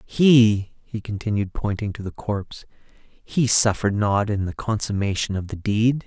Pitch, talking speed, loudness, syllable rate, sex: 105 Hz, 160 wpm, -22 LUFS, 4.4 syllables/s, male